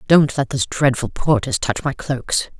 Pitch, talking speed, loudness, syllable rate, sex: 135 Hz, 185 wpm, -19 LUFS, 4.6 syllables/s, female